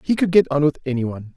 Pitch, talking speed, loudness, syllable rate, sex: 145 Hz, 265 wpm, -19 LUFS, 6.7 syllables/s, male